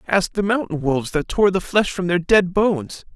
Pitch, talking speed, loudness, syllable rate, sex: 185 Hz, 230 wpm, -19 LUFS, 5.1 syllables/s, male